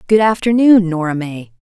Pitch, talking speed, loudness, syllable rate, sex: 185 Hz, 145 wpm, -13 LUFS, 5.0 syllables/s, female